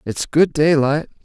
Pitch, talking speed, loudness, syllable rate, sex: 150 Hz, 145 wpm, -17 LUFS, 4.0 syllables/s, male